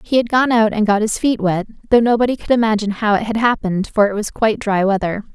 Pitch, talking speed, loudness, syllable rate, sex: 215 Hz, 260 wpm, -16 LUFS, 6.5 syllables/s, female